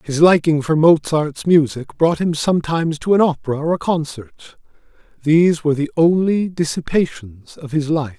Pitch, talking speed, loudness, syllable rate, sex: 155 Hz, 160 wpm, -17 LUFS, 5.1 syllables/s, male